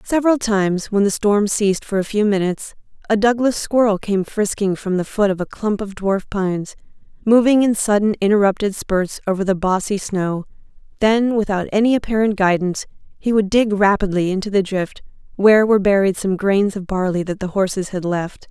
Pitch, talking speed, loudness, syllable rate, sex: 200 Hz, 185 wpm, -18 LUFS, 5.5 syllables/s, female